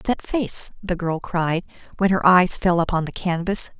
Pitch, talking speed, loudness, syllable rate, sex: 180 Hz, 190 wpm, -21 LUFS, 4.4 syllables/s, female